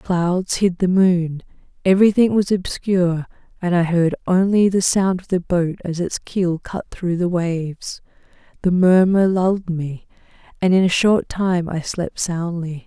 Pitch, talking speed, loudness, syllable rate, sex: 180 Hz, 165 wpm, -19 LUFS, 4.2 syllables/s, female